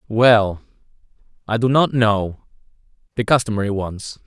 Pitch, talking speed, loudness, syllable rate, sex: 110 Hz, 85 wpm, -18 LUFS, 4.4 syllables/s, male